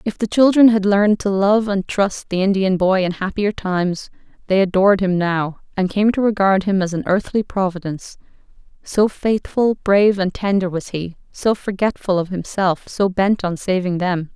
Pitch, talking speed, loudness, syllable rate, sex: 195 Hz, 180 wpm, -18 LUFS, 4.9 syllables/s, female